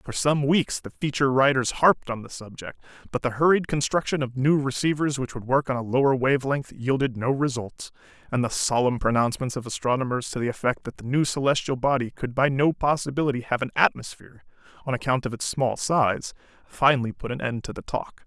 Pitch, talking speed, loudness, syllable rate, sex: 130 Hz, 205 wpm, -24 LUFS, 5.8 syllables/s, male